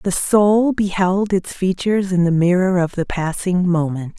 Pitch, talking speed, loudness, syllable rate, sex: 185 Hz, 170 wpm, -17 LUFS, 4.4 syllables/s, female